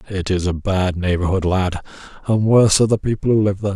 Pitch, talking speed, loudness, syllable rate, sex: 100 Hz, 225 wpm, -18 LUFS, 6.5 syllables/s, male